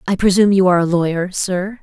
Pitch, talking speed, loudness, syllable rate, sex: 185 Hz, 230 wpm, -15 LUFS, 6.6 syllables/s, female